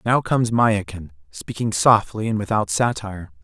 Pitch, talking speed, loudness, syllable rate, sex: 105 Hz, 140 wpm, -20 LUFS, 4.9 syllables/s, male